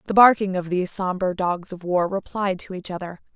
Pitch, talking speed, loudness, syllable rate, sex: 185 Hz, 215 wpm, -22 LUFS, 5.5 syllables/s, female